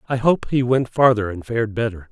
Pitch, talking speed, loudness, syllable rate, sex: 115 Hz, 225 wpm, -19 LUFS, 5.5 syllables/s, male